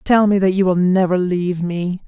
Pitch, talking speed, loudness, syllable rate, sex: 185 Hz, 230 wpm, -17 LUFS, 5.2 syllables/s, female